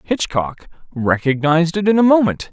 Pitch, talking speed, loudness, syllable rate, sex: 165 Hz, 145 wpm, -16 LUFS, 5.1 syllables/s, male